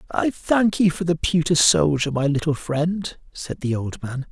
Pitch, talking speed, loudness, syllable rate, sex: 160 Hz, 195 wpm, -21 LUFS, 4.3 syllables/s, male